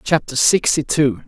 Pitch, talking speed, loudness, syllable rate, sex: 145 Hz, 140 wpm, -16 LUFS, 4.4 syllables/s, male